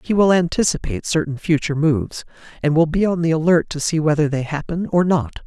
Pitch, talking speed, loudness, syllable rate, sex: 160 Hz, 210 wpm, -19 LUFS, 6.2 syllables/s, male